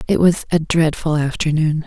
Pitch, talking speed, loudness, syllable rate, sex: 160 Hz, 160 wpm, -17 LUFS, 4.9 syllables/s, female